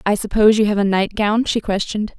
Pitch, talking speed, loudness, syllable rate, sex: 210 Hz, 220 wpm, -17 LUFS, 6.3 syllables/s, female